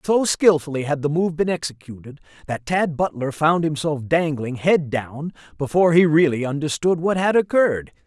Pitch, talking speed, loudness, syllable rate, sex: 155 Hz, 165 wpm, -20 LUFS, 5.1 syllables/s, male